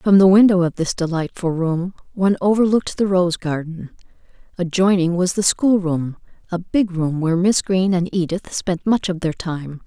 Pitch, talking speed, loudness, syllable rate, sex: 180 Hz, 175 wpm, -18 LUFS, 4.9 syllables/s, female